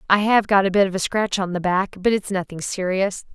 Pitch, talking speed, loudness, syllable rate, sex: 195 Hz, 270 wpm, -20 LUFS, 5.5 syllables/s, female